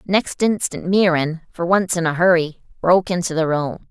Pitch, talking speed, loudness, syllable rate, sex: 175 Hz, 185 wpm, -19 LUFS, 5.0 syllables/s, female